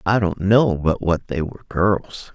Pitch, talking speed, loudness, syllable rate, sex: 95 Hz, 205 wpm, -20 LUFS, 4.4 syllables/s, male